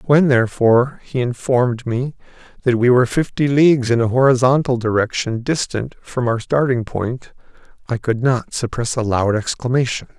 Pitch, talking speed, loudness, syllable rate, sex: 125 Hz, 155 wpm, -18 LUFS, 5.1 syllables/s, male